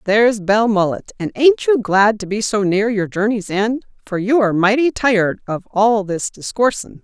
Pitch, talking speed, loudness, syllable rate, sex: 215 Hz, 180 wpm, -17 LUFS, 4.7 syllables/s, female